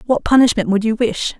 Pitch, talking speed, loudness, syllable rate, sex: 225 Hz, 215 wpm, -15 LUFS, 5.7 syllables/s, female